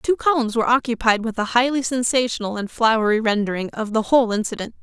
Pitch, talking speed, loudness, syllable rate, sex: 230 Hz, 185 wpm, -20 LUFS, 6.3 syllables/s, female